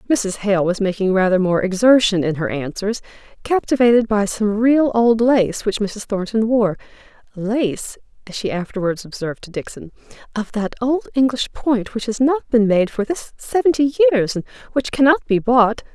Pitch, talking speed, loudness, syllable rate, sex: 220 Hz, 175 wpm, -18 LUFS, 4.8 syllables/s, female